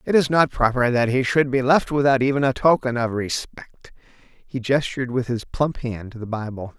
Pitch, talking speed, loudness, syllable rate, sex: 125 Hz, 210 wpm, -21 LUFS, 5.1 syllables/s, male